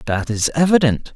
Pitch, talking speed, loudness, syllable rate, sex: 140 Hz, 155 wpm, -17 LUFS, 5.1 syllables/s, male